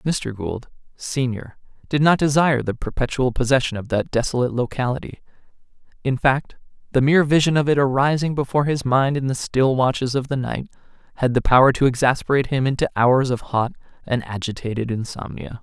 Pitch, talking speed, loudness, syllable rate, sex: 130 Hz, 170 wpm, -20 LUFS, 5.8 syllables/s, male